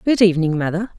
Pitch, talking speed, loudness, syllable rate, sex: 185 Hz, 185 wpm, -18 LUFS, 7.3 syllables/s, female